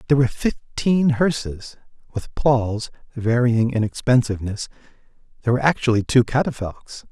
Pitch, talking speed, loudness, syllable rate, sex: 120 Hz, 120 wpm, -21 LUFS, 5.4 syllables/s, male